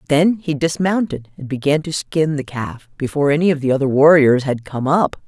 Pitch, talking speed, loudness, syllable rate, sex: 145 Hz, 205 wpm, -17 LUFS, 5.3 syllables/s, female